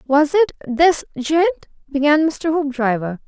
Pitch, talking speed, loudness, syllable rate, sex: 295 Hz, 110 wpm, -18 LUFS, 4.0 syllables/s, female